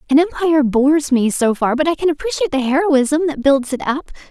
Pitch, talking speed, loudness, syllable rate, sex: 290 Hz, 225 wpm, -16 LUFS, 6.0 syllables/s, female